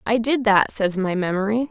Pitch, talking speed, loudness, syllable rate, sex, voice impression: 215 Hz, 210 wpm, -20 LUFS, 5.0 syllables/s, female, very feminine, young, thin, very tensed, powerful, very bright, very hard, very clear, fluent, cute, slightly cool, intellectual, refreshing, very sincere, very calm, very friendly, very reassuring, very unique, elegant, slightly wild, slightly sweet, slightly lively, slightly strict, sharp, slightly modest, light